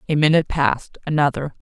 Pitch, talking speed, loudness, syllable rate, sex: 150 Hz, 110 wpm, -19 LUFS, 7.0 syllables/s, female